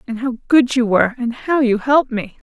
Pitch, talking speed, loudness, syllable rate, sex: 245 Hz, 240 wpm, -17 LUFS, 5.6 syllables/s, female